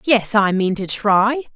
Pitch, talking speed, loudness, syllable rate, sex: 210 Hz, 195 wpm, -17 LUFS, 3.7 syllables/s, female